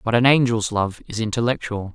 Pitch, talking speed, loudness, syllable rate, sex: 115 Hz, 185 wpm, -20 LUFS, 5.7 syllables/s, male